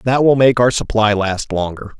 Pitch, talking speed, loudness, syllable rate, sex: 115 Hz, 210 wpm, -15 LUFS, 4.9 syllables/s, male